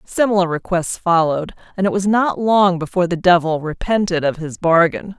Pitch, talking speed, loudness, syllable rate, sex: 180 Hz, 175 wpm, -17 LUFS, 5.4 syllables/s, female